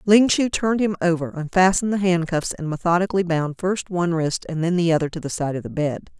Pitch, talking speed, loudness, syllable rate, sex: 175 Hz, 235 wpm, -21 LUFS, 6.1 syllables/s, female